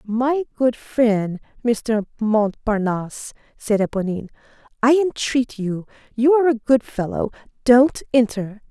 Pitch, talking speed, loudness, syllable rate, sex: 230 Hz, 115 wpm, -20 LUFS, 4.1 syllables/s, female